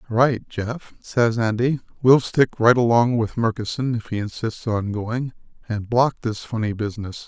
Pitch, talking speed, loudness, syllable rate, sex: 115 Hz, 165 wpm, -21 LUFS, 4.6 syllables/s, male